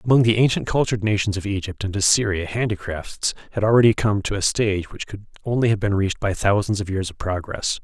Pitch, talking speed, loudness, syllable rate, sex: 105 Hz, 215 wpm, -21 LUFS, 6.1 syllables/s, male